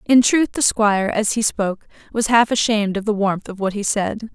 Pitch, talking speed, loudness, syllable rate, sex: 215 Hz, 235 wpm, -18 LUFS, 5.3 syllables/s, female